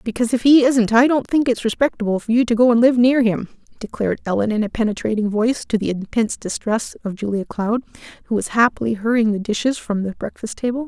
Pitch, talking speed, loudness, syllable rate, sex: 230 Hz, 220 wpm, -19 LUFS, 6.3 syllables/s, female